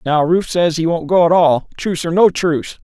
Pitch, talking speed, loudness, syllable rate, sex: 165 Hz, 225 wpm, -15 LUFS, 5.7 syllables/s, male